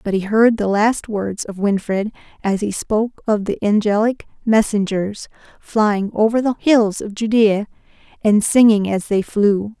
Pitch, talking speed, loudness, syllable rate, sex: 210 Hz, 160 wpm, -17 LUFS, 4.3 syllables/s, female